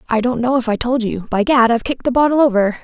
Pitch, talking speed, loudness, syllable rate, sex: 240 Hz, 275 wpm, -16 LUFS, 6.9 syllables/s, female